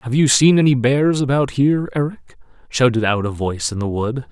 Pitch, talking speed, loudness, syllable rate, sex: 125 Hz, 210 wpm, -17 LUFS, 5.5 syllables/s, male